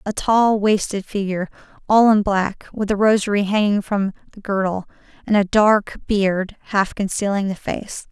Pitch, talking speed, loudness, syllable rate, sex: 200 Hz, 165 wpm, -19 LUFS, 4.7 syllables/s, female